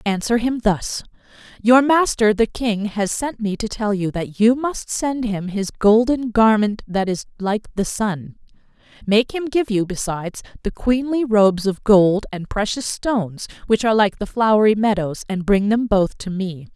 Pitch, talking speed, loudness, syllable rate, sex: 215 Hz, 185 wpm, -19 LUFS, 4.5 syllables/s, female